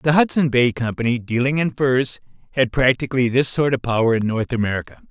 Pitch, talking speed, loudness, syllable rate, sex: 125 Hz, 190 wpm, -19 LUFS, 5.8 syllables/s, male